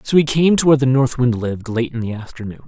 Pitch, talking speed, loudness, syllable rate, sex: 125 Hz, 290 wpm, -17 LUFS, 6.8 syllables/s, male